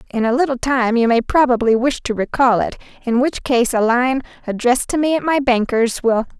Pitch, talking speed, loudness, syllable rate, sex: 250 Hz, 215 wpm, -17 LUFS, 5.3 syllables/s, female